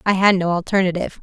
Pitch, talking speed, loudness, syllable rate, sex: 185 Hz, 195 wpm, -18 LUFS, 7.2 syllables/s, female